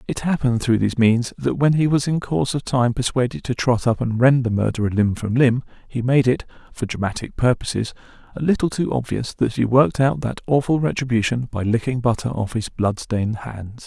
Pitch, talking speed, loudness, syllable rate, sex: 120 Hz, 210 wpm, -20 LUFS, 5.3 syllables/s, male